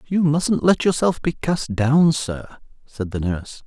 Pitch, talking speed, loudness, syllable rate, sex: 145 Hz, 180 wpm, -20 LUFS, 4.0 syllables/s, male